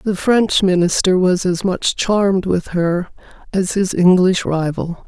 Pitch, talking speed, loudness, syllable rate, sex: 185 Hz, 155 wpm, -16 LUFS, 3.9 syllables/s, female